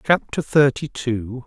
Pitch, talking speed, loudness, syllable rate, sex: 130 Hz, 125 wpm, -20 LUFS, 3.8 syllables/s, male